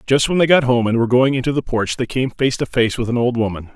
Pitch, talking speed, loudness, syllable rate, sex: 125 Hz, 320 wpm, -17 LUFS, 6.4 syllables/s, male